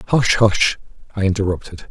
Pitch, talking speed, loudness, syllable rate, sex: 105 Hz, 125 wpm, -18 LUFS, 4.6 syllables/s, male